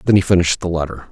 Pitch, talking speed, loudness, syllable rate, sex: 90 Hz, 270 wpm, -17 LUFS, 8.0 syllables/s, male